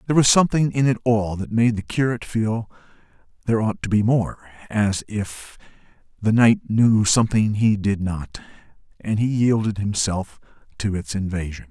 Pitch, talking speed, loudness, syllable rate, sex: 110 Hz, 160 wpm, -21 LUFS, 5.0 syllables/s, male